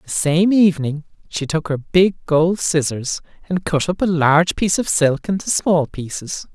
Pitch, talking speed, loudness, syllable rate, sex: 165 Hz, 185 wpm, -18 LUFS, 4.7 syllables/s, male